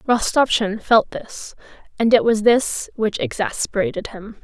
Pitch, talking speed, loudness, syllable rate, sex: 225 Hz, 135 wpm, -19 LUFS, 4.3 syllables/s, female